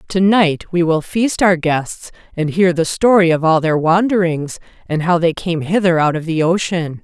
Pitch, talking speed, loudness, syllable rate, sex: 170 Hz, 205 wpm, -15 LUFS, 4.6 syllables/s, female